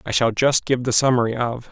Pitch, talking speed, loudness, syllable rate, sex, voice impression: 120 Hz, 245 wpm, -19 LUFS, 5.7 syllables/s, male, masculine, adult-like, slightly thick, cool, sincere, slightly wild